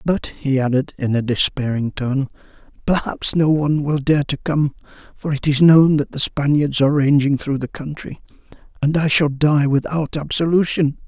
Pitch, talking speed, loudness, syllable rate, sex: 145 Hz, 175 wpm, -18 LUFS, 4.8 syllables/s, male